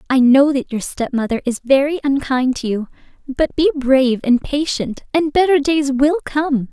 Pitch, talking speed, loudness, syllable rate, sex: 275 Hz, 180 wpm, -17 LUFS, 4.6 syllables/s, female